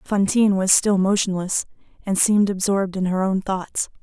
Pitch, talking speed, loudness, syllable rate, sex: 195 Hz, 165 wpm, -20 LUFS, 5.2 syllables/s, female